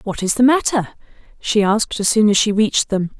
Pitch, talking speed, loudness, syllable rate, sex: 215 Hz, 225 wpm, -16 LUFS, 5.7 syllables/s, female